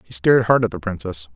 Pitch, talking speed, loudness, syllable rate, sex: 100 Hz, 265 wpm, -19 LUFS, 6.5 syllables/s, male